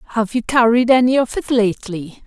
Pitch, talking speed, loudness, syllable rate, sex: 230 Hz, 185 wpm, -16 LUFS, 5.7 syllables/s, female